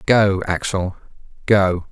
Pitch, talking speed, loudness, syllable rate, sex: 95 Hz, 95 wpm, -19 LUFS, 3.3 syllables/s, male